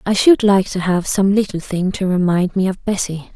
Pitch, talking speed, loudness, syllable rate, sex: 190 Hz, 235 wpm, -16 LUFS, 5.0 syllables/s, female